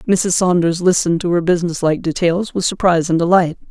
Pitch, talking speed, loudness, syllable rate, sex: 175 Hz, 180 wpm, -16 LUFS, 6.4 syllables/s, female